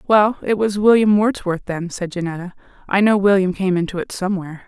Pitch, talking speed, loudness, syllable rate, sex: 195 Hz, 190 wpm, -18 LUFS, 5.8 syllables/s, female